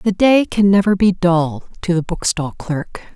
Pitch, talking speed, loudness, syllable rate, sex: 185 Hz, 190 wpm, -16 LUFS, 4.1 syllables/s, female